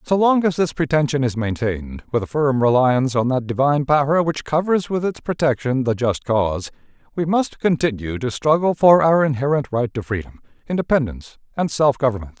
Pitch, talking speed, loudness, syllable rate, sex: 135 Hz, 185 wpm, -19 LUFS, 5.6 syllables/s, male